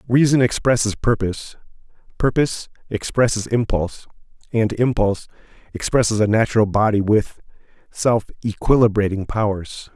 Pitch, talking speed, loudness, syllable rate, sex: 110 Hz, 95 wpm, -19 LUFS, 5.2 syllables/s, male